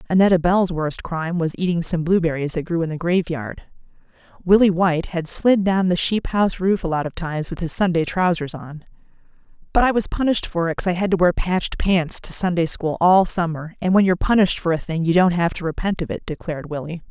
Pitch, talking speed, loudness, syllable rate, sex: 175 Hz, 225 wpm, -20 LUFS, 6.0 syllables/s, female